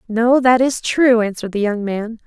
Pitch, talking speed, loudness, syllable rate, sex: 230 Hz, 210 wpm, -16 LUFS, 4.8 syllables/s, female